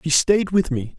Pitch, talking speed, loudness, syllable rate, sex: 160 Hz, 245 wpm, -19 LUFS, 4.3 syllables/s, male